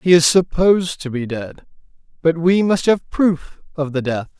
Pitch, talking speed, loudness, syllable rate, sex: 160 Hz, 190 wpm, -18 LUFS, 4.4 syllables/s, male